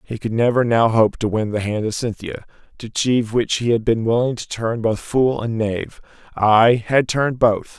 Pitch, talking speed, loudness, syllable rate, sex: 115 Hz, 210 wpm, -19 LUFS, 5.1 syllables/s, male